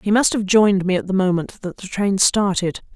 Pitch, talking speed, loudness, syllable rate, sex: 195 Hz, 245 wpm, -18 LUFS, 5.3 syllables/s, female